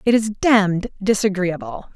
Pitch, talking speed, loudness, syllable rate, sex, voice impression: 200 Hz, 125 wpm, -19 LUFS, 4.6 syllables/s, female, feminine, adult-like, slightly intellectual, slightly elegant